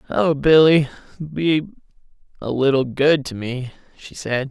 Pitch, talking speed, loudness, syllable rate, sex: 140 Hz, 135 wpm, -18 LUFS, 4.1 syllables/s, male